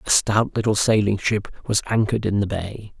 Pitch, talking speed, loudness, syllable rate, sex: 105 Hz, 200 wpm, -21 LUFS, 5.5 syllables/s, male